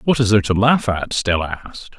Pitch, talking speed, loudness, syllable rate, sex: 105 Hz, 240 wpm, -17 LUFS, 6.4 syllables/s, male